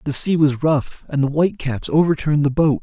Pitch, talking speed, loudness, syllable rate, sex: 150 Hz, 210 wpm, -18 LUFS, 5.6 syllables/s, male